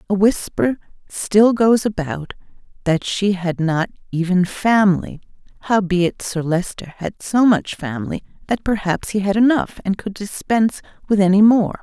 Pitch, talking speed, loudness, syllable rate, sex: 195 Hz, 145 wpm, -18 LUFS, 4.7 syllables/s, female